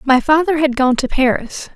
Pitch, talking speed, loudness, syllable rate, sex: 275 Hz, 205 wpm, -15 LUFS, 4.9 syllables/s, female